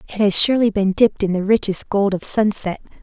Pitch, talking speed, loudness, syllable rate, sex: 205 Hz, 220 wpm, -18 LUFS, 6.0 syllables/s, female